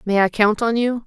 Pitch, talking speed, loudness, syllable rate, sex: 220 Hz, 280 wpm, -18 LUFS, 5.2 syllables/s, female